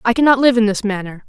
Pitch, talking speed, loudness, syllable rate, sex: 225 Hz, 280 wpm, -15 LUFS, 6.8 syllables/s, female